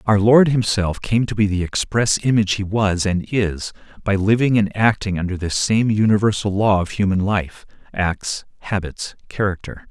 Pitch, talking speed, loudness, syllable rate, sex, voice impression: 100 Hz, 165 wpm, -19 LUFS, 4.7 syllables/s, male, masculine, adult-like, tensed, powerful, bright, clear, fluent, cool, intellectual, mature, friendly, wild, lively